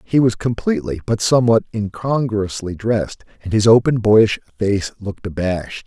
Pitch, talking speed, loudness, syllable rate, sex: 110 Hz, 145 wpm, -18 LUFS, 5.1 syllables/s, male